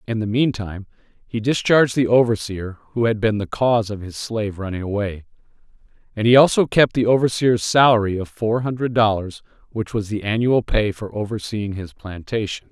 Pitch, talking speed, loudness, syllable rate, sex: 110 Hz, 175 wpm, -20 LUFS, 5.5 syllables/s, male